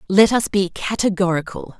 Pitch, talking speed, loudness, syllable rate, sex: 195 Hz, 135 wpm, -18 LUFS, 5.1 syllables/s, female